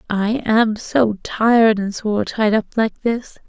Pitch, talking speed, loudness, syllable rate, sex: 220 Hz, 170 wpm, -18 LUFS, 3.5 syllables/s, female